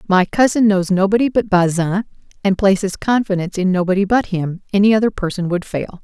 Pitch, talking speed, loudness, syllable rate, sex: 195 Hz, 180 wpm, -17 LUFS, 5.7 syllables/s, female